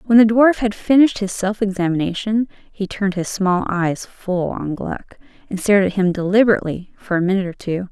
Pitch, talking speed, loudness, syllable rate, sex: 200 Hz, 195 wpm, -18 LUFS, 5.7 syllables/s, female